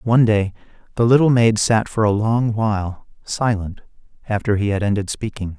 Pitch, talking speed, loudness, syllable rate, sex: 105 Hz, 170 wpm, -19 LUFS, 5.1 syllables/s, male